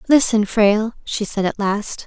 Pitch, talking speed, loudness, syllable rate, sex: 220 Hz, 175 wpm, -18 LUFS, 4.5 syllables/s, female